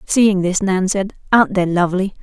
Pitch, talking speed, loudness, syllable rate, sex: 190 Hz, 190 wpm, -16 LUFS, 5.3 syllables/s, female